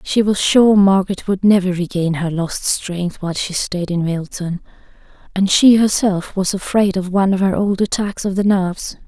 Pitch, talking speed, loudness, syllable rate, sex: 190 Hz, 190 wpm, -16 LUFS, 4.9 syllables/s, female